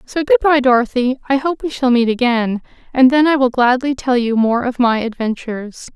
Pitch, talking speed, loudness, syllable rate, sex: 255 Hz, 210 wpm, -15 LUFS, 5.2 syllables/s, female